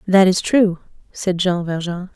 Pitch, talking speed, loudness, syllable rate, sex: 185 Hz, 165 wpm, -18 LUFS, 4.2 syllables/s, female